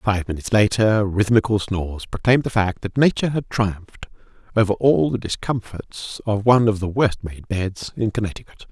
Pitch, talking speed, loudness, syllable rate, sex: 105 Hz, 170 wpm, -20 LUFS, 5.3 syllables/s, male